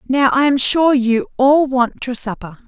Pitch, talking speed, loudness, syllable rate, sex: 265 Hz, 200 wpm, -15 LUFS, 4.2 syllables/s, female